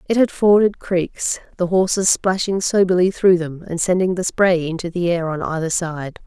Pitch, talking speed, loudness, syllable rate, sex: 180 Hz, 190 wpm, -18 LUFS, 4.7 syllables/s, female